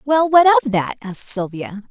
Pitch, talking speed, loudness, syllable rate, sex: 255 Hz, 190 wpm, -16 LUFS, 4.7 syllables/s, female